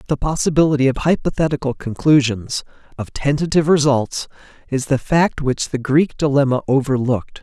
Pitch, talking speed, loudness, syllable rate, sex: 140 Hz, 130 wpm, -18 LUFS, 5.4 syllables/s, male